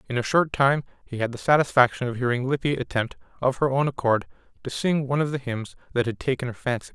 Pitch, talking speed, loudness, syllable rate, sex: 130 Hz, 235 wpm, -24 LUFS, 6.4 syllables/s, male